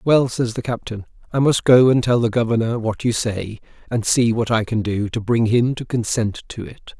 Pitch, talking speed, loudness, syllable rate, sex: 115 Hz, 230 wpm, -19 LUFS, 5.0 syllables/s, male